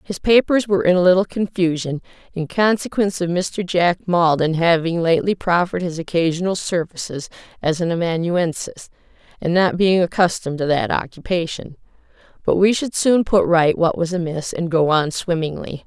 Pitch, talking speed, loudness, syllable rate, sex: 175 Hz, 160 wpm, -19 LUFS, 5.2 syllables/s, female